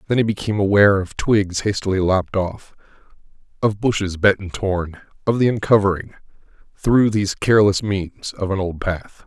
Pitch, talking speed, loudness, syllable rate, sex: 100 Hz, 160 wpm, -19 LUFS, 5.3 syllables/s, male